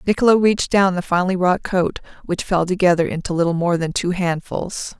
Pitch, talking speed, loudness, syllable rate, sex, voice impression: 180 Hz, 190 wpm, -19 LUFS, 5.7 syllables/s, female, feminine, slightly gender-neutral, adult-like, slightly middle-aged, slightly thin, slightly relaxed, slightly weak, dark, hard, slightly muffled, fluent, slightly cool, intellectual, very sincere, very calm, friendly, reassuring, slightly unique, elegant, slightly sweet, very kind, very modest